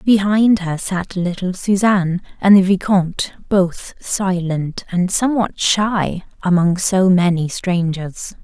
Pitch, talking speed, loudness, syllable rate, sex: 185 Hz, 120 wpm, -17 LUFS, 3.7 syllables/s, female